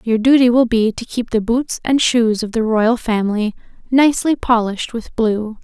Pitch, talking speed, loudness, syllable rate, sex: 230 Hz, 190 wpm, -16 LUFS, 4.9 syllables/s, female